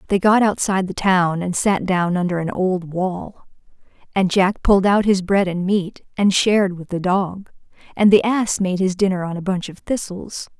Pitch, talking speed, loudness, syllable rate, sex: 190 Hz, 205 wpm, -19 LUFS, 4.7 syllables/s, female